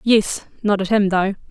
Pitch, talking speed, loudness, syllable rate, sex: 200 Hz, 200 wpm, -19 LUFS, 4.5 syllables/s, female